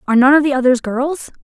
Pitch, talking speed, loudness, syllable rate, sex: 270 Hz, 250 wpm, -14 LUFS, 6.6 syllables/s, female